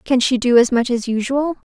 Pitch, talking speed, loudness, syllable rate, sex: 250 Hz, 245 wpm, -17 LUFS, 5.4 syllables/s, female